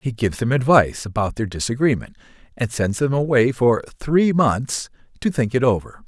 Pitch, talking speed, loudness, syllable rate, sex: 120 Hz, 180 wpm, -20 LUFS, 5.2 syllables/s, male